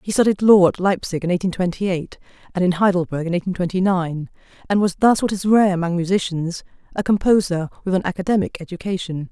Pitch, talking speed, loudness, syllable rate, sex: 185 Hz, 185 wpm, -19 LUFS, 6.1 syllables/s, female